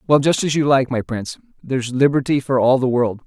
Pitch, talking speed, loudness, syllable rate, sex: 135 Hz, 240 wpm, -18 LUFS, 5.9 syllables/s, male